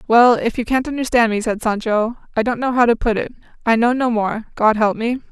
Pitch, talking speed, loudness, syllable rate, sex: 230 Hz, 250 wpm, -18 LUFS, 5.7 syllables/s, female